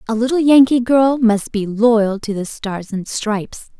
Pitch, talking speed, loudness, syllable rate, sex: 225 Hz, 190 wpm, -16 LUFS, 4.3 syllables/s, female